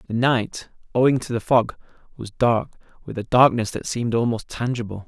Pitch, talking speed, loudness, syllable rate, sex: 120 Hz, 180 wpm, -21 LUFS, 5.4 syllables/s, male